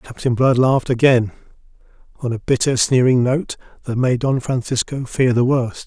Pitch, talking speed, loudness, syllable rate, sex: 125 Hz, 165 wpm, -18 LUFS, 4.9 syllables/s, male